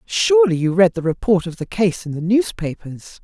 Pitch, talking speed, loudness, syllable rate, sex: 190 Hz, 205 wpm, -18 LUFS, 5.1 syllables/s, female